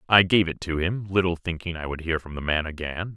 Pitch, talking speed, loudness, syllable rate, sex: 85 Hz, 265 wpm, -25 LUFS, 5.7 syllables/s, male